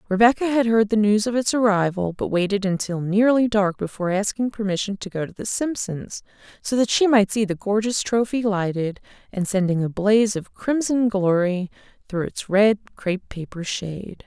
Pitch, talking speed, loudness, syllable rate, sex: 205 Hz, 180 wpm, -21 LUFS, 5.1 syllables/s, female